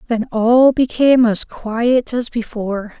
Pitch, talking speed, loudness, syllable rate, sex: 235 Hz, 140 wpm, -16 LUFS, 4.0 syllables/s, female